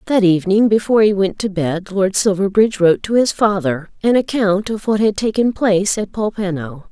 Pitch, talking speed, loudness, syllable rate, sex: 200 Hz, 190 wpm, -16 LUFS, 5.5 syllables/s, female